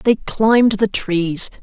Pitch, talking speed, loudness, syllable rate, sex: 205 Hz, 150 wpm, -16 LUFS, 3.5 syllables/s, male